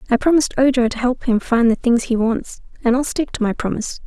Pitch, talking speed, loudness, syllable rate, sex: 240 Hz, 250 wpm, -18 LUFS, 6.2 syllables/s, female